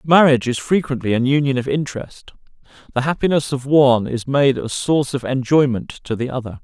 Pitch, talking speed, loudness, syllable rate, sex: 135 Hz, 180 wpm, -18 LUFS, 5.7 syllables/s, male